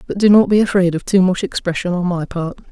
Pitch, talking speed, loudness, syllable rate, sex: 185 Hz, 265 wpm, -16 LUFS, 5.9 syllables/s, female